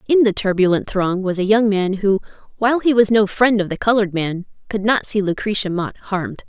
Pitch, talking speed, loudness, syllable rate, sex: 205 Hz, 220 wpm, -18 LUFS, 5.7 syllables/s, female